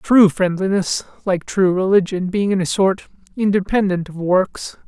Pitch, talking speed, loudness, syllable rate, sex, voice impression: 190 Hz, 150 wpm, -18 LUFS, 4.4 syllables/s, male, slightly masculine, slightly gender-neutral, adult-like, relaxed, slightly weak, slightly soft, fluent, raspy, friendly, unique, slightly lively, slightly kind, slightly modest